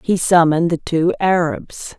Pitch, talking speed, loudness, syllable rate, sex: 165 Hz, 150 wpm, -16 LUFS, 4.4 syllables/s, female